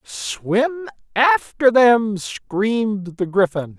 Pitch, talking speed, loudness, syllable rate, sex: 220 Hz, 95 wpm, -18 LUFS, 2.6 syllables/s, male